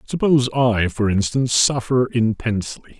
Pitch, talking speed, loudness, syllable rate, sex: 120 Hz, 120 wpm, -19 LUFS, 4.9 syllables/s, male